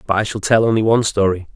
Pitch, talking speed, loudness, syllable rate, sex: 105 Hz, 270 wpm, -16 LUFS, 7.3 syllables/s, male